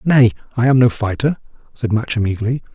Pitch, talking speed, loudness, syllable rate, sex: 120 Hz, 175 wpm, -17 LUFS, 6.1 syllables/s, male